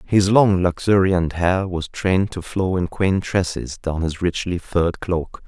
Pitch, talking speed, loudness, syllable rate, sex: 90 Hz, 175 wpm, -20 LUFS, 4.1 syllables/s, male